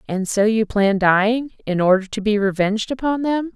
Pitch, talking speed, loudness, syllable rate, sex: 215 Hz, 200 wpm, -19 LUFS, 5.3 syllables/s, female